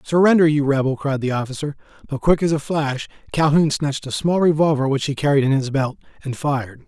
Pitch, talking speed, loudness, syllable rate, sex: 145 Hz, 210 wpm, -19 LUFS, 5.9 syllables/s, male